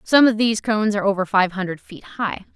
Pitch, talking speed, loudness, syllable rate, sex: 205 Hz, 235 wpm, -20 LUFS, 6.3 syllables/s, female